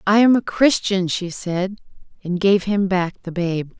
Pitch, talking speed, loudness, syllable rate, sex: 190 Hz, 190 wpm, -19 LUFS, 4.2 syllables/s, female